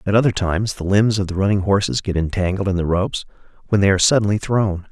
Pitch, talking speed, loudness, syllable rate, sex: 100 Hz, 230 wpm, -18 LUFS, 6.7 syllables/s, male